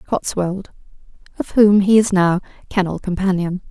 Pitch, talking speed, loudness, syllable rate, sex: 190 Hz, 130 wpm, -17 LUFS, 4.7 syllables/s, female